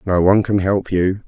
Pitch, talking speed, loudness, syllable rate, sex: 95 Hz, 235 wpm, -17 LUFS, 5.4 syllables/s, male